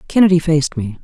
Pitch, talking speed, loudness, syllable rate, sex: 155 Hz, 175 wpm, -15 LUFS, 7.0 syllables/s, female